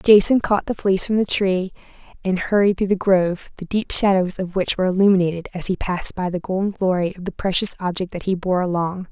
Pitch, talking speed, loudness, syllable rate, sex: 190 Hz, 225 wpm, -20 LUFS, 6.0 syllables/s, female